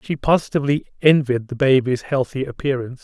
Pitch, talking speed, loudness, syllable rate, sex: 135 Hz, 140 wpm, -19 LUFS, 6.1 syllables/s, male